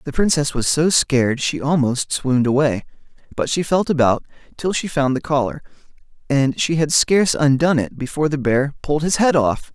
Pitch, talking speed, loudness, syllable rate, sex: 145 Hz, 190 wpm, -18 LUFS, 5.5 syllables/s, male